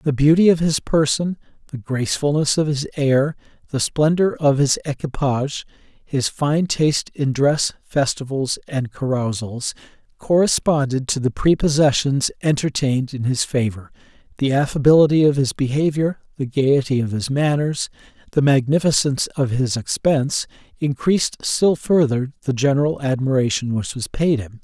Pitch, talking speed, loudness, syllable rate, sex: 140 Hz, 135 wpm, -19 LUFS, 4.9 syllables/s, male